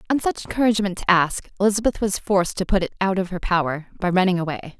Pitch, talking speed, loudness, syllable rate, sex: 190 Hz, 225 wpm, -21 LUFS, 6.9 syllables/s, female